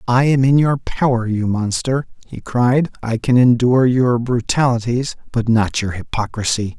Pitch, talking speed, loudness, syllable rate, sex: 120 Hz, 160 wpm, -17 LUFS, 4.6 syllables/s, male